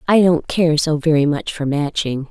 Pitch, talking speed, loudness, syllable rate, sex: 155 Hz, 210 wpm, -17 LUFS, 4.7 syllables/s, female